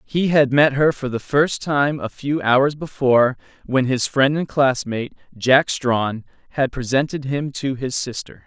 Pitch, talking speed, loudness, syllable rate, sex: 135 Hz, 175 wpm, -19 LUFS, 4.2 syllables/s, male